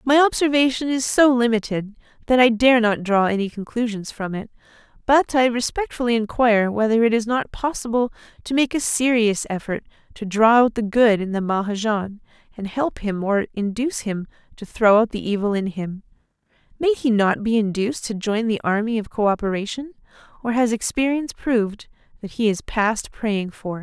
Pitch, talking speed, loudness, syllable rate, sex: 225 Hz, 175 wpm, -20 LUFS, 5.2 syllables/s, female